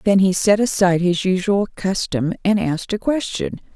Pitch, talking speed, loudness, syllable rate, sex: 195 Hz, 175 wpm, -19 LUFS, 5.1 syllables/s, female